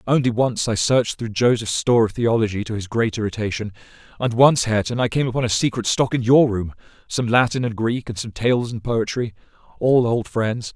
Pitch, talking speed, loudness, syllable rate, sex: 115 Hz, 200 wpm, -20 LUFS, 5.6 syllables/s, male